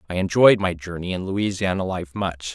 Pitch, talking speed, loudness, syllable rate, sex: 90 Hz, 190 wpm, -21 LUFS, 5.1 syllables/s, male